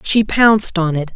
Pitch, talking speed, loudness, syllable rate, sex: 190 Hz, 210 wpm, -14 LUFS, 4.9 syllables/s, female